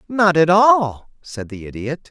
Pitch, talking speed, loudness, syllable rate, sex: 160 Hz, 170 wpm, -15 LUFS, 3.8 syllables/s, male